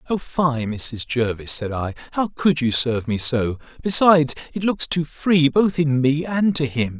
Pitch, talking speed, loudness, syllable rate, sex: 145 Hz, 195 wpm, -20 LUFS, 4.4 syllables/s, male